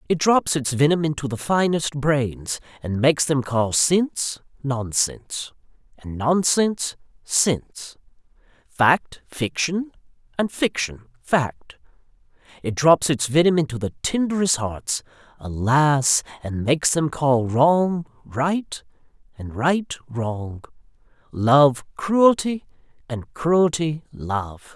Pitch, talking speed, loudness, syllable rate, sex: 145 Hz, 110 wpm, -21 LUFS, 3.4 syllables/s, male